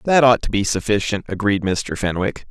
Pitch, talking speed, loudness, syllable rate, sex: 105 Hz, 190 wpm, -19 LUFS, 5.2 syllables/s, male